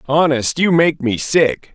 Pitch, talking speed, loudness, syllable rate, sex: 145 Hz, 170 wpm, -15 LUFS, 3.8 syllables/s, male